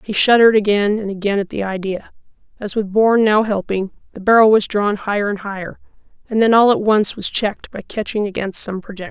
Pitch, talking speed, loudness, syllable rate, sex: 205 Hz, 210 wpm, -16 LUFS, 6.0 syllables/s, female